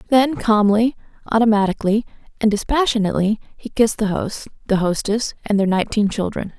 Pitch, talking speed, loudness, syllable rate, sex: 215 Hz, 135 wpm, -19 LUFS, 5.9 syllables/s, female